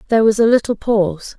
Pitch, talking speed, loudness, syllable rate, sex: 215 Hz, 215 wpm, -15 LUFS, 6.8 syllables/s, female